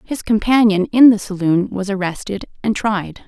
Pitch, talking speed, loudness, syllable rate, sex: 205 Hz, 165 wpm, -16 LUFS, 4.7 syllables/s, female